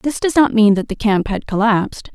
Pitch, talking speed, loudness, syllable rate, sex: 225 Hz, 250 wpm, -16 LUFS, 5.3 syllables/s, female